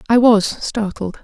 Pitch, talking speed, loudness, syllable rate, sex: 215 Hz, 145 wpm, -16 LUFS, 3.9 syllables/s, female